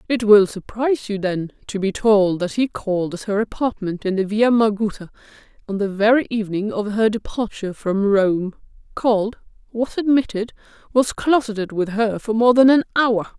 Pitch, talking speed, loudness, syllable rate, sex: 215 Hz, 175 wpm, -19 LUFS, 5.1 syllables/s, female